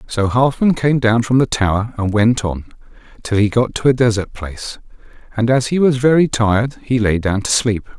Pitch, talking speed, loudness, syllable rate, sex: 115 Hz, 210 wpm, -16 LUFS, 5.2 syllables/s, male